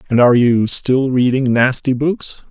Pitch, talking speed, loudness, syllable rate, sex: 130 Hz, 170 wpm, -14 LUFS, 4.4 syllables/s, male